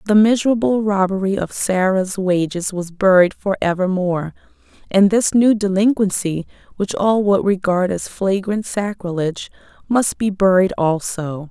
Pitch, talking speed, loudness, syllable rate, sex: 195 Hz, 130 wpm, -18 LUFS, 4.6 syllables/s, female